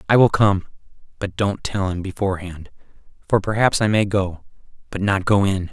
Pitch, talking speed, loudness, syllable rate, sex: 100 Hz, 180 wpm, -20 LUFS, 5.2 syllables/s, male